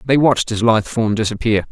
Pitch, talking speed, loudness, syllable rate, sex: 115 Hz, 210 wpm, -16 LUFS, 6.2 syllables/s, male